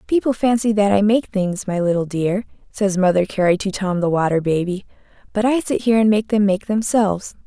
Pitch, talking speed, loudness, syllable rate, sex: 200 Hz, 210 wpm, -18 LUFS, 5.5 syllables/s, female